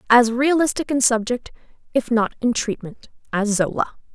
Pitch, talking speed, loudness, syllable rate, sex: 240 Hz, 145 wpm, -20 LUFS, 4.8 syllables/s, female